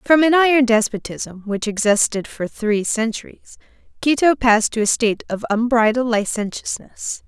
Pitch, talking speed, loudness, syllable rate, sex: 230 Hz, 140 wpm, -18 LUFS, 4.8 syllables/s, female